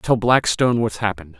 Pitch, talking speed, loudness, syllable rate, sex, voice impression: 110 Hz, 170 wpm, -19 LUFS, 6.0 syllables/s, male, masculine, adult-like, tensed, powerful, bright, soft, clear, cool, intellectual, slightly refreshing, wild, lively, kind, slightly intense